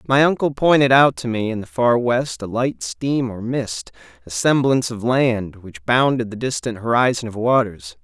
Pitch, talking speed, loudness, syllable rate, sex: 115 Hz, 195 wpm, -19 LUFS, 4.7 syllables/s, male